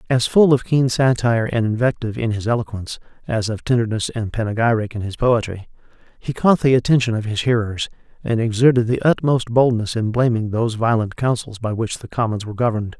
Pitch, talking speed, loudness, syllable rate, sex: 115 Hz, 190 wpm, -19 LUFS, 6.0 syllables/s, male